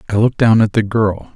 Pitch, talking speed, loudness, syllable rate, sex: 110 Hz, 265 wpm, -14 LUFS, 6.1 syllables/s, male